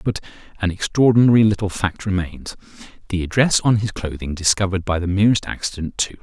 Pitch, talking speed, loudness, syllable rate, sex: 100 Hz, 165 wpm, -19 LUFS, 6.0 syllables/s, male